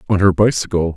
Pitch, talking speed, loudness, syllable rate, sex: 95 Hz, 190 wpm, -16 LUFS, 6.3 syllables/s, male